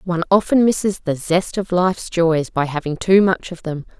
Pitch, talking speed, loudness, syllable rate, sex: 175 Hz, 210 wpm, -18 LUFS, 5.0 syllables/s, female